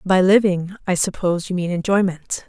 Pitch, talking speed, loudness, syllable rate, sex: 185 Hz, 170 wpm, -19 LUFS, 5.3 syllables/s, female